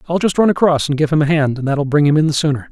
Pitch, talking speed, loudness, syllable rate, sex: 150 Hz, 355 wpm, -15 LUFS, 7.1 syllables/s, male